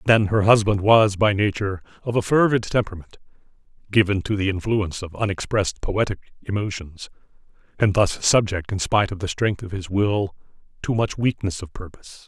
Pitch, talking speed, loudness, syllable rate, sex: 100 Hz, 165 wpm, -21 LUFS, 5.8 syllables/s, male